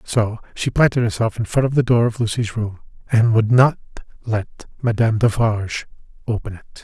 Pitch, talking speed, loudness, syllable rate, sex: 115 Hz, 175 wpm, -19 LUFS, 5.2 syllables/s, male